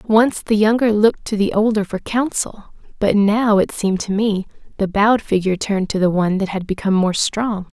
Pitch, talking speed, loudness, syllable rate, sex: 205 Hz, 210 wpm, -18 LUFS, 5.5 syllables/s, female